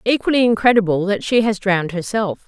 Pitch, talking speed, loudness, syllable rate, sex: 205 Hz, 170 wpm, -17 LUFS, 5.9 syllables/s, female